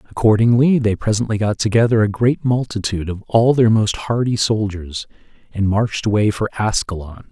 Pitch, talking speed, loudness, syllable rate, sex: 110 Hz, 155 wpm, -17 LUFS, 5.3 syllables/s, male